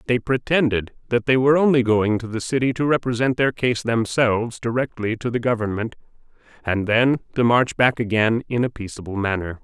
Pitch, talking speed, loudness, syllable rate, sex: 120 Hz, 180 wpm, -20 LUFS, 5.5 syllables/s, male